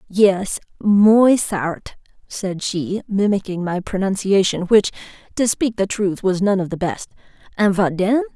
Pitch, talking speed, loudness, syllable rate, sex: 200 Hz, 135 wpm, -18 LUFS, 4.0 syllables/s, female